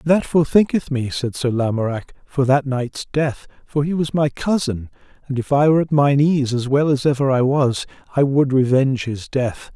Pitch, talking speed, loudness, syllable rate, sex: 135 Hz, 205 wpm, -19 LUFS, 4.8 syllables/s, male